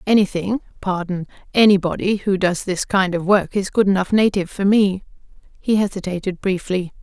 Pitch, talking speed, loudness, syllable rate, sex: 190 Hz, 135 wpm, -19 LUFS, 5.3 syllables/s, female